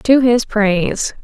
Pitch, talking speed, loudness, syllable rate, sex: 220 Hz, 145 wpm, -15 LUFS, 3.5 syllables/s, female